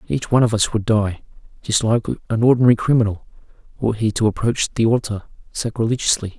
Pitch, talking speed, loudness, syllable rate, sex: 110 Hz, 170 wpm, -19 LUFS, 6.4 syllables/s, male